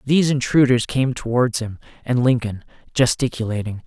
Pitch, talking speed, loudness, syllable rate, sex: 125 Hz, 125 wpm, -20 LUFS, 5.3 syllables/s, male